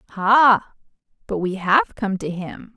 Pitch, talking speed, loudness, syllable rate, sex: 200 Hz, 150 wpm, -19 LUFS, 3.7 syllables/s, female